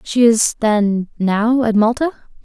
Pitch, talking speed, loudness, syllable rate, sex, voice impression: 225 Hz, 150 wpm, -16 LUFS, 3.7 syllables/s, female, very feminine, young, slightly adult-like, very thin, slightly relaxed, weak, slightly dark, hard, clear, slightly muffled, very fluent, raspy, very cute, slightly cool, intellectual, refreshing, sincere, slightly calm, very friendly, very reassuring, very unique, slightly elegant, wild, sweet, very lively, strict, intense, slightly sharp, slightly modest, light